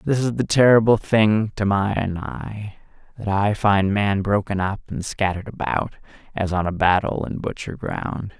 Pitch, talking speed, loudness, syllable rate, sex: 105 Hz, 170 wpm, -21 LUFS, 4.3 syllables/s, male